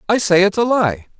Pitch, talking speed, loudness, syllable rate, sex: 190 Hz, 250 wpm, -15 LUFS, 5.5 syllables/s, male